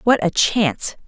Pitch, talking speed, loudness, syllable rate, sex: 210 Hz, 170 wpm, -18 LUFS, 4.4 syllables/s, female